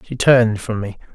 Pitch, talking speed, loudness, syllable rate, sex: 110 Hz, 210 wpm, -17 LUFS, 6.0 syllables/s, male